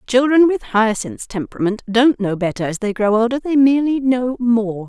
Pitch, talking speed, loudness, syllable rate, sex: 235 Hz, 185 wpm, -17 LUFS, 5.1 syllables/s, female